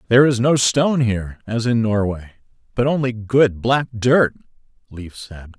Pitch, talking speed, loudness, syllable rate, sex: 115 Hz, 160 wpm, -18 LUFS, 4.8 syllables/s, male